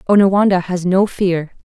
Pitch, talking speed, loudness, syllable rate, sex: 185 Hz, 145 wpm, -15 LUFS, 5.0 syllables/s, female